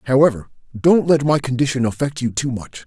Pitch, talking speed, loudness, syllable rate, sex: 130 Hz, 190 wpm, -18 LUFS, 5.7 syllables/s, male